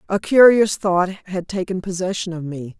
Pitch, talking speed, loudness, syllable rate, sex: 185 Hz, 170 wpm, -18 LUFS, 4.6 syllables/s, female